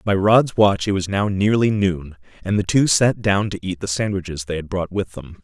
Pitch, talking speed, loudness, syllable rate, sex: 95 Hz, 245 wpm, -19 LUFS, 4.9 syllables/s, male